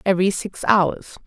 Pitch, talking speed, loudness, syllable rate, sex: 190 Hz, 145 wpm, -20 LUFS, 4.9 syllables/s, female